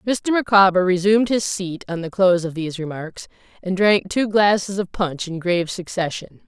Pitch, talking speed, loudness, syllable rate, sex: 185 Hz, 185 wpm, -19 LUFS, 5.3 syllables/s, female